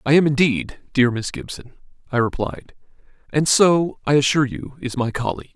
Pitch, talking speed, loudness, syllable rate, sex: 135 Hz, 175 wpm, -20 LUFS, 5.2 syllables/s, male